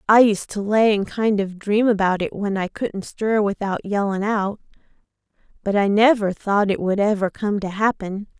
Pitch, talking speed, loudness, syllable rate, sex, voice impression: 205 Hz, 195 wpm, -20 LUFS, 4.6 syllables/s, female, very feminine, young, thin, tensed, powerful, bright, slightly soft, clear, slightly fluent, cute, intellectual, refreshing, very sincere, calm, friendly, reassuring, slightly unique, slightly elegant, slightly wild, sweet, lively, slightly strict, slightly intense, sharp